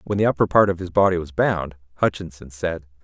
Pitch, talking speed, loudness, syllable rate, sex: 90 Hz, 220 wpm, -21 LUFS, 5.9 syllables/s, male